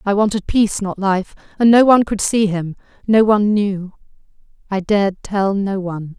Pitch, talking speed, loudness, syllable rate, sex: 200 Hz, 175 wpm, -16 LUFS, 5.2 syllables/s, female